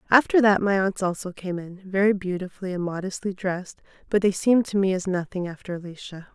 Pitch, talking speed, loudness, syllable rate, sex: 190 Hz, 200 wpm, -24 LUFS, 6.1 syllables/s, female